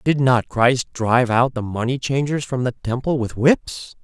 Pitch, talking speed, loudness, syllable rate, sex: 125 Hz, 195 wpm, -19 LUFS, 4.5 syllables/s, male